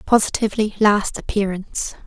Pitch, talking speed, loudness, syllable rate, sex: 205 Hz, 85 wpm, -20 LUFS, 5.5 syllables/s, female